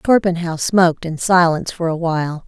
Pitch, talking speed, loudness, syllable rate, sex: 170 Hz, 170 wpm, -17 LUFS, 5.4 syllables/s, female